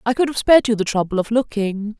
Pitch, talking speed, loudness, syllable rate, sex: 220 Hz, 270 wpm, -18 LUFS, 6.4 syllables/s, female